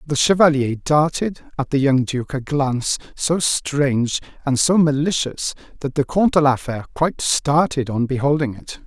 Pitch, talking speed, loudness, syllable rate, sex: 145 Hz, 170 wpm, -19 LUFS, 4.9 syllables/s, male